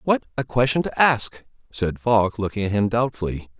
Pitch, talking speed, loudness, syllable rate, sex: 115 Hz, 185 wpm, -22 LUFS, 5.0 syllables/s, male